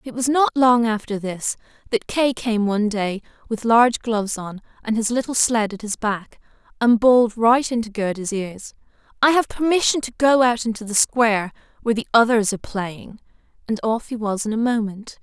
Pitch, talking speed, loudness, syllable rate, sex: 225 Hz, 195 wpm, -20 LUFS, 5.3 syllables/s, female